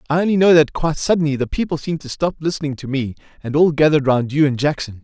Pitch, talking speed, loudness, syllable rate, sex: 150 Hz, 250 wpm, -18 LUFS, 7.1 syllables/s, male